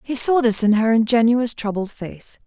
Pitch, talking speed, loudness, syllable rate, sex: 230 Hz, 195 wpm, -17 LUFS, 4.7 syllables/s, female